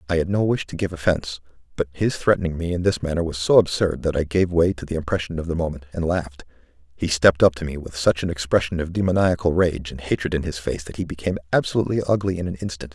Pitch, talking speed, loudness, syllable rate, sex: 85 Hz, 245 wpm, -22 LUFS, 6.8 syllables/s, male